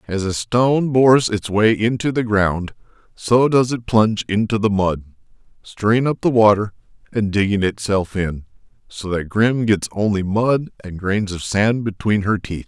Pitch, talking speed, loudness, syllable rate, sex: 105 Hz, 175 wpm, -18 LUFS, 4.5 syllables/s, male